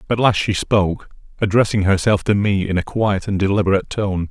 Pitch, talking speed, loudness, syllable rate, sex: 100 Hz, 195 wpm, -18 LUFS, 5.7 syllables/s, male